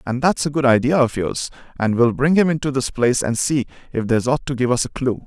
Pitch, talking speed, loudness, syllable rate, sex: 130 Hz, 275 wpm, -19 LUFS, 6.1 syllables/s, male